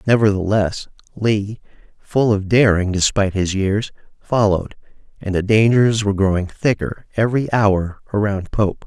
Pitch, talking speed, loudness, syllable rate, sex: 105 Hz, 130 wpm, -18 LUFS, 4.8 syllables/s, male